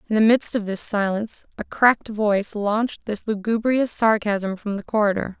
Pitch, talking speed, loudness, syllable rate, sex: 215 Hz, 180 wpm, -21 LUFS, 5.2 syllables/s, female